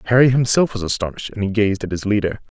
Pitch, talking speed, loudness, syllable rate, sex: 105 Hz, 230 wpm, -19 LUFS, 7.3 syllables/s, male